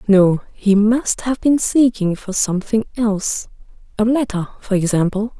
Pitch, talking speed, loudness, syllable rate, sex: 215 Hz, 135 wpm, -17 LUFS, 4.5 syllables/s, female